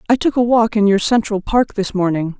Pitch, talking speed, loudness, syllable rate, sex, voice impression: 210 Hz, 250 wpm, -16 LUFS, 5.5 syllables/s, female, very feminine, adult-like, slightly middle-aged, thin, tensed, slightly weak, slightly dark, hard, clear, slightly fluent, slightly raspy, cool, very intellectual, slightly refreshing, very sincere, very calm, slightly friendly, reassuring, unique, elegant, slightly sweet, slightly lively, strict, sharp, slightly modest, slightly light